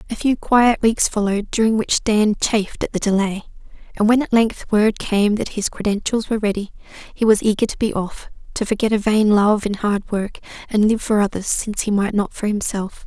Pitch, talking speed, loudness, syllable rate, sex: 210 Hz, 215 wpm, -19 LUFS, 5.4 syllables/s, female